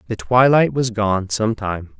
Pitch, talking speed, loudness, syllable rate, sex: 110 Hz, 180 wpm, -18 LUFS, 3.9 syllables/s, male